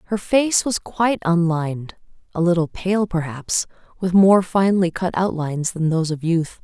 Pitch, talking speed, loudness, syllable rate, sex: 175 Hz, 155 wpm, -19 LUFS, 4.9 syllables/s, female